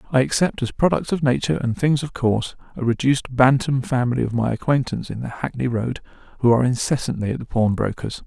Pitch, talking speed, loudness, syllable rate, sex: 125 Hz, 195 wpm, -21 LUFS, 6.3 syllables/s, male